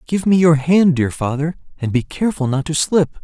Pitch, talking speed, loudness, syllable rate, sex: 155 Hz, 225 wpm, -17 LUFS, 5.4 syllables/s, male